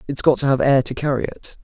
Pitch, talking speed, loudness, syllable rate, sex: 135 Hz, 295 wpm, -19 LUFS, 6.2 syllables/s, male